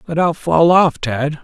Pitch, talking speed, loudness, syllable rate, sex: 150 Hz, 210 wpm, -15 LUFS, 3.9 syllables/s, male